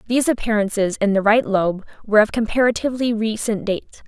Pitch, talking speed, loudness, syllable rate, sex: 220 Hz, 160 wpm, -19 LUFS, 6.3 syllables/s, female